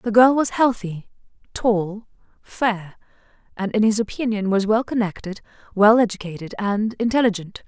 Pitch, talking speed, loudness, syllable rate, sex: 215 Hz, 135 wpm, -20 LUFS, 4.7 syllables/s, female